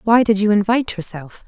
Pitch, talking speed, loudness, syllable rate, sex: 210 Hz, 205 wpm, -17 LUFS, 5.8 syllables/s, female